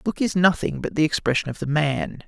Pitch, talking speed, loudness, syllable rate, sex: 150 Hz, 265 wpm, -22 LUFS, 6.3 syllables/s, male